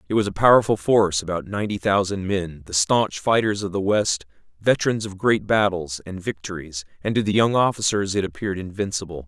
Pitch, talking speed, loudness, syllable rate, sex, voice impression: 100 Hz, 190 wpm, -22 LUFS, 5.8 syllables/s, male, masculine, adult-like, tensed, powerful, clear, fluent, cool, intellectual, slightly mature, wild, lively, strict, sharp